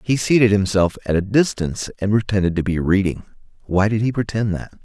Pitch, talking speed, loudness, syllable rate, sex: 100 Hz, 200 wpm, -19 LUFS, 5.8 syllables/s, male